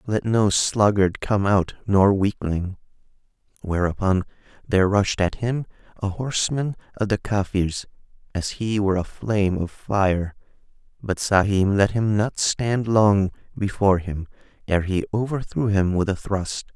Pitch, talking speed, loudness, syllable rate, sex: 100 Hz, 145 wpm, -22 LUFS, 4.3 syllables/s, male